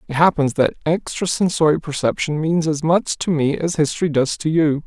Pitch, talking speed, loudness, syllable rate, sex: 155 Hz, 185 wpm, -19 LUFS, 5.2 syllables/s, male